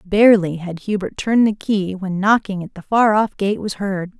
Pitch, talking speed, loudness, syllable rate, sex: 200 Hz, 215 wpm, -18 LUFS, 5.0 syllables/s, female